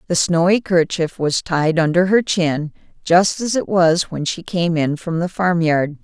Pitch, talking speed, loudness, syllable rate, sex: 170 Hz, 200 wpm, -17 LUFS, 4.2 syllables/s, female